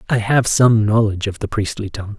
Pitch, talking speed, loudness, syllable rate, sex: 105 Hz, 220 wpm, -17 LUFS, 5.5 syllables/s, male